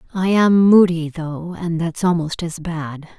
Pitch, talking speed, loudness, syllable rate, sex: 170 Hz, 170 wpm, -18 LUFS, 4.0 syllables/s, female